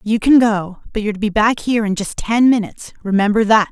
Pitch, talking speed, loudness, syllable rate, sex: 215 Hz, 240 wpm, -16 LUFS, 6.2 syllables/s, female